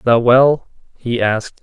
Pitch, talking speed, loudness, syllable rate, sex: 120 Hz, 150 wpm, -14 LUFS, 4.0 syllables/s, male